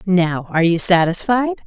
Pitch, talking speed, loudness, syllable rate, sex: 190 Hz, 145 wpm, -16 LUFS, 5.0 syllables/s, female